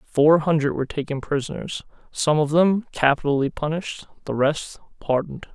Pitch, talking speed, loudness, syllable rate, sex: 150 Hz, 140 wpm, -22 LUFS, 5.4 syllables/s, male